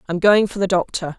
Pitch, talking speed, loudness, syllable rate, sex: 185 Hz, 305 wpm, -18 LUFS, 6.9 syllables/s, female